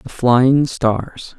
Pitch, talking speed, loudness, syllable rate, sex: 125 Hz, 130 wpm, -15 LUFS, 2.2 syllables/s, male